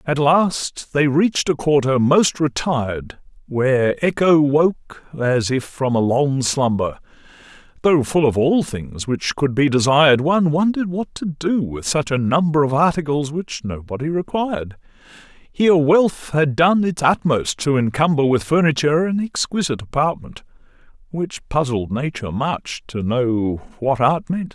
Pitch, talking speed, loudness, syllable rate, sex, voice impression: 145 Hz, 150 wpm, -18 LUFS, 4.3 syllables/s, male, masculine, adult-like, cool, slightly sincere, sweet